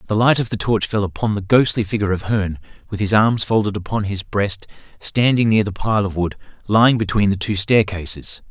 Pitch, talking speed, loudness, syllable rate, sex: 105 Hz, 210 wpm, -18 LUFS, 5.7 syllables/s, male